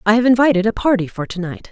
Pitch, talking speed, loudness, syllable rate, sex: 210 Hz, 280 wpm, -16 LUFS, 7.0 syllables/s, female